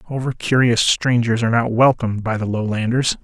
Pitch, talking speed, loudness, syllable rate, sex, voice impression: 115 Hz, 165 wpm, -18 LUFS, 5.7 syllables/s, male, very masculine, middle-aged, thick, sincere, slightly mature, slightly wild